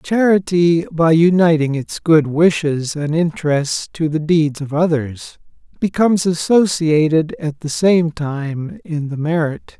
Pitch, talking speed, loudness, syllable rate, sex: 160 Hz, 135 wpm, -16 LUFS, 3.9 syllables/s, male